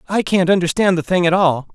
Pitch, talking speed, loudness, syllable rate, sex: 175 Hz, 240 wpm, -16 LUFS, 5.8 syllables/s, male